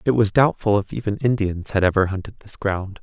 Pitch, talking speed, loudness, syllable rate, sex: 105 Hz, 220 wpm, -21 LUFS, 5.5 syllables/s, male